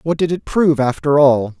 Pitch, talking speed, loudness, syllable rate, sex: 145 Hz, 225 wpm, -15 LUFS, 5.2 syllables/s, male